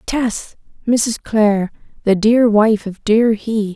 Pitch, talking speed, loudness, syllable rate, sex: 220 Hz, 110 wpm, -16 LUFS, 3.4 syllables/s, female